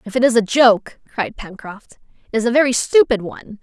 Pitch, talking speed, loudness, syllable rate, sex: 230 Hz, 215 wpm, -16 LUFS, 5.6 syllables/s, female